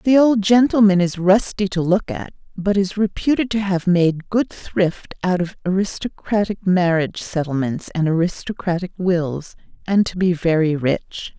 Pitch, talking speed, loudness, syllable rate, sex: 185 Hz, 155 wpm, -19 LUFS, 4.4 syllables/s, female